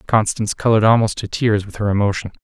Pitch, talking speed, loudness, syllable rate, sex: 105 Hz, 195 wpm, -17 LUFS, 6.8 syllables/s, male